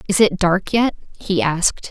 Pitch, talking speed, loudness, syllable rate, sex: 195 Hz, 190 wpm, -18 LUFS, 4.9 syllables/s, female